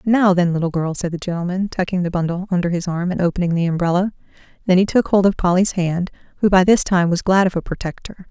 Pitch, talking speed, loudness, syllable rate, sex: 180 Hz, 240 wpm, -18 LUFS, 6.3 syllables/s, female